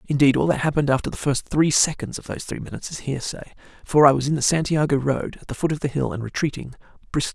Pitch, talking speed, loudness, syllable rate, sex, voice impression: 140 Hz, 255 wpm, -22 LUFS, 7.0 syllables/s, male, masculine, adult-like, weak, slightly dark, muffled, halting, slightly cool, sincere, calm, slightly friendly, slightly reassuring, unique, slightly wild, kind, slightly modest